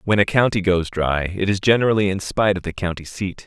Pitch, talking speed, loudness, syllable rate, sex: 95 Hz, 240 wpm, -20 LUFS, 6.0 syllables/s, male